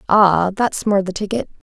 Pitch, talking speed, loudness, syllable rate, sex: 200 Hz, 175 wpm, -18 LUFS, 4.4 syllables/s, female